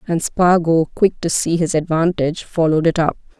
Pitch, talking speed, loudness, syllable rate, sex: 165 Hz, 175 wpm, -17 LUFS, 5.3 syllables/s, female